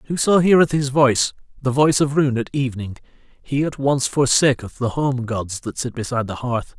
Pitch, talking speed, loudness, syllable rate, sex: 130 Hz, 195 wpm, -19 LUFS, 5.4 syllables/s, male